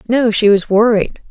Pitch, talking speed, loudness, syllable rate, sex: 220 Hz, 140 wpm, -13 LUFS, 4.6 syllables/s, female